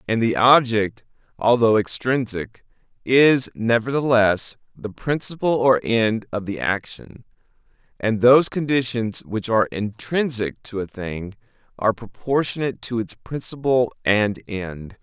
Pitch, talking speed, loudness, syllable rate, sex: 115 Hz, 120 wpm, -21 LUFS, 4.2 syllables/s, male